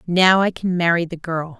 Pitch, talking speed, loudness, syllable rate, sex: 175 Hz, 225 wpm, -18 LUFS, 4.8 syllables/s, female